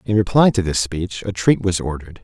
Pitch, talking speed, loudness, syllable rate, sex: 95 Hz, 240 wpm, -18 LUFS, 5.8 syllables/s, male